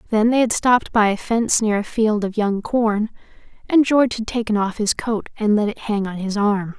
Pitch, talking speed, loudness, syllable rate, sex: 215 Hz, 240 wpm, -19 LUFS, 5.2 syllables/s, female